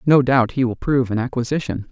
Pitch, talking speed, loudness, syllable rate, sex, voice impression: 125 Hz, 220 wpm, -19 LUFS, 6.2 syllables/s, male, very masculine, very adult-like, very middle-aged, very thick, relaxed, weak, dark, slightly soft, muffled, slightly fluent, cool, very intellectual, slightly refreshing, very sincere, very calm, friendly, very reassuring, unique, very elegant, very sweet, very kind, modest